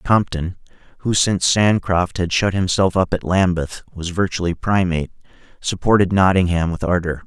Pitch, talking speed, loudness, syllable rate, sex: 90 Hz, 140 wpm, -18 LUFS, 5.1 syllables/s, male